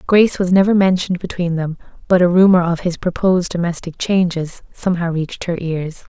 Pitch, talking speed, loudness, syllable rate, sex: 175 Hz, 175 wpm, -17 LUFS, 5.8 syllables/s, female